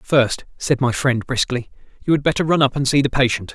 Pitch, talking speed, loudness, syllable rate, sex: 130 Hz, 235 wpm, -19 LUFS, 5.6 syllables/s, male